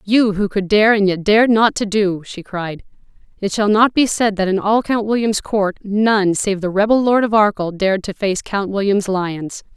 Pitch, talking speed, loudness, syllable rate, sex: 205 Hz, 220 wpm, -16 LUFS, 4.7 syllables/s, female